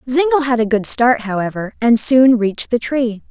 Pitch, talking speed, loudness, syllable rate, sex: 240 Hz, 200 wpm, -15 LUFS, 5.0 syllables/s, female